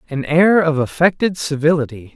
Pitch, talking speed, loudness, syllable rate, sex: 155 Hz, 140 wpm, -16 LUFS, 5.1 syllables/s, male